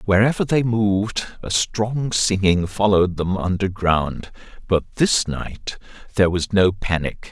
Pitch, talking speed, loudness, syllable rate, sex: 100 Hz, 130 wpm, -20 LUFS, 4.1 syllables/s, male